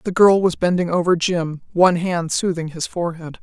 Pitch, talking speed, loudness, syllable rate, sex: 170 Hz, 195 wpm, -19 LUFS, 5.3 syllables/s, female